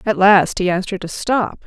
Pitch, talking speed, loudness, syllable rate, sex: 195 Hz, 250 wpm, -16 LUFS, 5.2 syllables/s, female